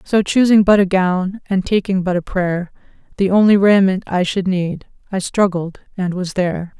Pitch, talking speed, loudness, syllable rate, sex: 190 Hz, 185 wpm, -16 LUFS, 4.6 syllables/s, female